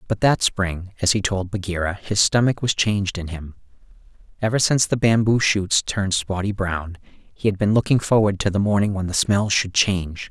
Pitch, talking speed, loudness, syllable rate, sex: 100 Hz, 200 wpm, -20 LUFS, 5.2 syllables/s, male